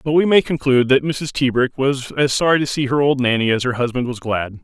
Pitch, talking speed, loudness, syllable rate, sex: 130 Hz, 260 wpm, -17 LUFS, 5.8 syllables/s, male